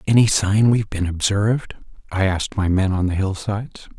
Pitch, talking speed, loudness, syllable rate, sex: 100 Hz, 195 wpm, -20 LUFS, 5.6 syllables/s, male